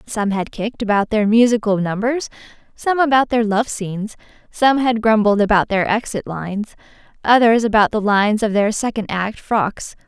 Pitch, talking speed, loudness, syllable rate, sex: 215 Hz, 165 wpm, -17 LUFS, 5.0 syllables/s, female